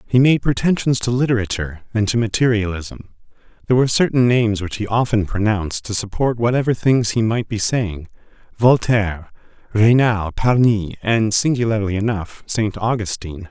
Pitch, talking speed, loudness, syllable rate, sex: 110 Hz, 140 wpm, -18 LUFS, 5.3 syllables/s, male